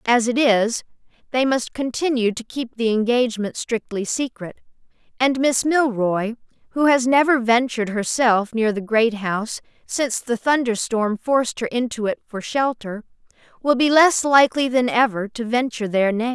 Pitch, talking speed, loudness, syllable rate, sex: 240 Hz, 160 wpm, -20 LUFS, 4.9 syllables/s, female